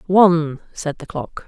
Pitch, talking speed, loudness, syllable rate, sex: 165 Hz, 160 wpm, -19 LUFS, 4.2 syllables/s, female